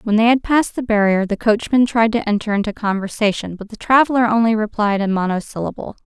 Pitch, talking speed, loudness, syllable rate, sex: 220 Hz, 200 wpm, -17 LUFS, 6.1 syllables/s, female